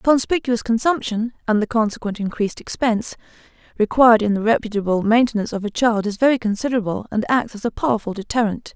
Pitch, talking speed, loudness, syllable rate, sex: 225 Hz, 170 wpm, -20 LUFS, 6.6 syllables/s, female